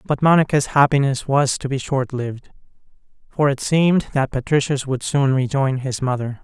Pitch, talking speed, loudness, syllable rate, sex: 135 Hz, 160 wpm, -19 LUFS, 5.0 syllables/s, male